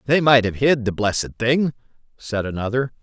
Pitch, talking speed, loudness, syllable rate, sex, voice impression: 120 Hz, 180 wpm, -20 LUFS, 5.1 syllables/s, male, masculine, adult-like, slightly thick, sincere, slightly friendly